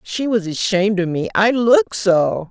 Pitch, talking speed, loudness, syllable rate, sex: 205 Hz, 190 wpm, -17 LUFS, 4.7 syllables/s, female